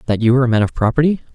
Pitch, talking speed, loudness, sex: 125 Hz, 310 wpm, -16 LUFS, male